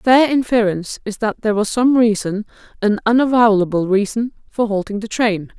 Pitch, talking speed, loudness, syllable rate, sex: 220 Hz, 170 wpm, -17 LUFS, 5.5 syllables/s, female